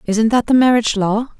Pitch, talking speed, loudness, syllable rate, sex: 225 Hz, 215 wpm, -15 LUFS, 5.5 syllables/s, female